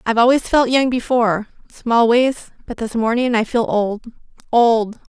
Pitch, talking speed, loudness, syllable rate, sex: 235 Hz, 140 wpm, -17 LUFS, 4.6 syllables/s, female